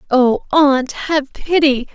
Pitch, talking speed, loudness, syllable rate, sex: 280 Hz, 125 wpm, -15 LUFS, 3.1 syllables/s, female